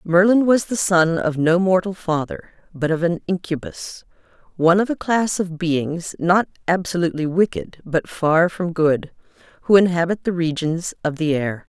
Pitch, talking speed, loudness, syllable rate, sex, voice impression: 175 Hz, 165 wpm, -19 LUFS, 4.7 syllables/s, female, very feminine, middle-aged, slightly thin, tensed, slightly powerful, bright, slightly soft, clear, fluent, slightly raspy, cool, very intellectual, refreshing, sincere, calm, very friendly, very reassuring, unique, elegant, slightly wild, sweet, lively, very kind, light